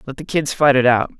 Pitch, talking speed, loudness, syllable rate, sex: 135 Hz, 305 wpm, -16 LUFS, 6.1 syllables/s, male